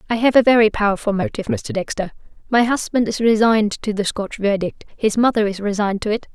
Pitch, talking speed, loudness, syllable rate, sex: 210 Hz, 210 wpm, -18 LUFS, 6.2 syllables/s, female